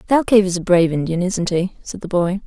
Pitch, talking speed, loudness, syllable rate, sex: 185 Hz, 245 wpm, -18 LUFS, 6.4 syllables/s, female